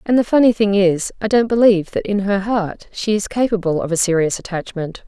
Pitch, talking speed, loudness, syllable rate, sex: 200 Hz, 225 wpm, -17 LUFS, 5.6 syllables/s, female